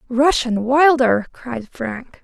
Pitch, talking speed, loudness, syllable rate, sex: 255 Hz, 135 wpm, -17 LUFS, 3.0 syllables/s, female